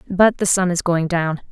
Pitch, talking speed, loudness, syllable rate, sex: 175 Hz, 235 wpm, -18 LUFS, 4.7 syllables/s, female